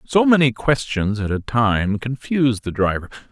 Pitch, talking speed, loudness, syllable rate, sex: 120 Hz, 165 wpm, -19 LUFS, 4.6 syllables/s, male